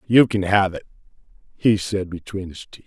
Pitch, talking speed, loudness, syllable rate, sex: 100 Hz, 190 wpm, -21 LUFS, 4.9 syllables/s, male